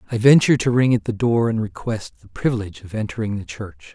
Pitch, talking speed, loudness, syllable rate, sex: 115 Hz, 230 wpm, -20 LUFS, 6.4 syllables/s, male